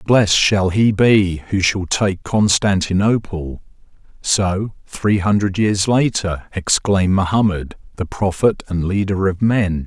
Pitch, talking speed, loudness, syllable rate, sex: 100 Hz, 130 wpm, -17 LUFS, 3.9 syllables/s, male